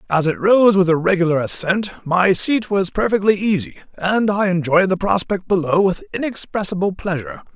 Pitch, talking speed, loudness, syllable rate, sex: 185 Hz, 165 wpm, -18 LUFS, 5.2 syllables/s, male